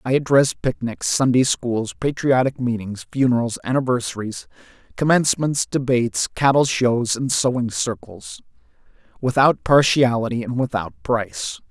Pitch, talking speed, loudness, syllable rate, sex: 125 Hz, 110 wpm, -20 LUFS, 4.8 syllables/s, male